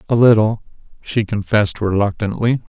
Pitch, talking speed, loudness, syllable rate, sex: 110 Hz, 110 wpm, -17 LUFS, 5.3 syllables/s, male